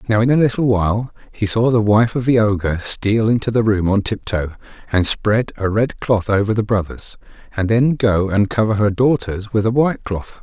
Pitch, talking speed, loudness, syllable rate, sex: 110 Hz, 215 wpm, -17 LUFS, 5.1 syllables/s, male